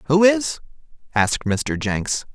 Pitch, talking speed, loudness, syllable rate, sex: 145 Hz, 130 wpm, -20 LUFS, 3.8 syllables/s, male